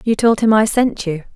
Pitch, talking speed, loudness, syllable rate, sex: 215 Hz, 265 wpm, -15 LUFS, 5.1 syllables/s, female